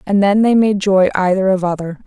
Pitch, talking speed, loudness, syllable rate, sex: 195 Hz, 230 wpm, -14 LUFS, 5.4 syllables/s, female